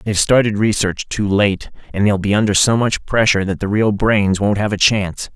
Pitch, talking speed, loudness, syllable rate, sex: 105 Hz, 225 wpm, -16 LUFS, 5.4 syllables/s, male